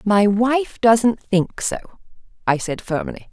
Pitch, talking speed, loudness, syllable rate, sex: 215 Hz, 145 wpm, -19 LUFS, 3.6 syllables/s, female